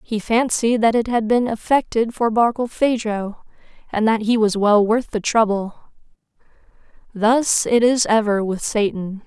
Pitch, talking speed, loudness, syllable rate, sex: 220 Hz, 150 wpm, -18 LUFS, 4.4 syllables/s, female